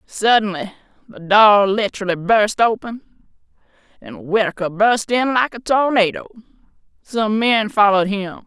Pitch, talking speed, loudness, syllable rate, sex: 210 Hz, 120 wpm, -17 LUFS, 4.6 syllables/s, female